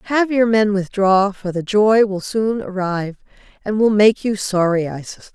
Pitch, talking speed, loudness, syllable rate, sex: 205 Hz, 190 wpm, -17 LUFS, 4.6 syllables/s, female